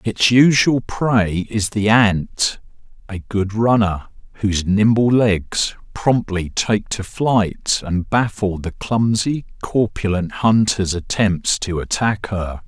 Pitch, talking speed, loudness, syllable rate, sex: 105 Hz, 125 wpm, -18 LUFS, 3.3 syllables/s, male